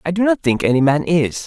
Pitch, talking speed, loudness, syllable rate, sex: 160 Hz, 285 wpm, -16 LUFS, 5.8 syllables/s, male